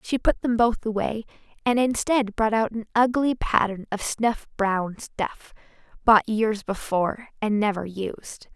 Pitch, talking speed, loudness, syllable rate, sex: 220 Hz, 155 wpm, -24 LUFS, 4.1 syllables/s, female